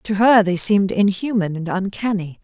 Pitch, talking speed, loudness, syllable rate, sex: 200 Hz, 170 wpm, -18 LUFS, 5.0 syllables/s, female